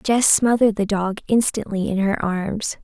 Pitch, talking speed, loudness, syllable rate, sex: 205 Hz, 170 wpm, -19 LUFS, 4.4 syllables/s, female